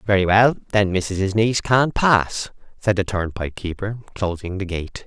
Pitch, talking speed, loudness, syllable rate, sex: 100 Hz, 165 wpm, -20 LUFS, 4.8 syllables/s, male